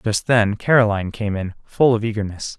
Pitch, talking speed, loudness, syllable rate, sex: 110 Hz, 210 wpm, -19 LUFS, 5.8 syllables/s, male